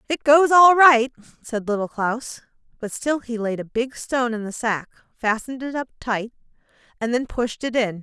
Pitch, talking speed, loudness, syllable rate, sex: 240 Hz, 195 wpm, -21 LUFS, 4.9 syllables/s, female